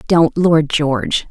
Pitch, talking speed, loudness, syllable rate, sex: 150 Hz, 140 wpm, -15 LUFS, 3.5 syllables/s, female